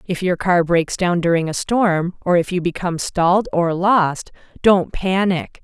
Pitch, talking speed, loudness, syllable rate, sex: 180 Hz, 180 wpm, -18 LUFS, 4.3 syllables/s, female